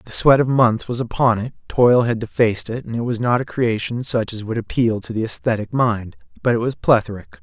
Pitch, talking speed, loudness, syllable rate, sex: 115 Hz, 235 wpm, -19 LUFS, 5.5 syllables/s, male